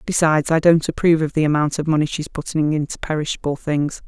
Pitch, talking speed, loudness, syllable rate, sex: 155 Hz, 205 wpm, -19 LUFS, 6.4 syllables/s, female